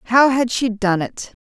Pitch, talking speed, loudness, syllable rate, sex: 230 Hz, 210 wpm, -18 LUFS, 4.4 syllables/s, female